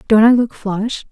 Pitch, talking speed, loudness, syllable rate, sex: 220 Hz, 215 wpm, -15 LUFS, 5.3 syllables/s, female